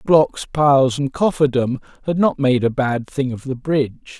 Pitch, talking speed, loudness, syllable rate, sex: 135 Hz, 185 wpm, -18 LUFS, 4.6 syllables/s, male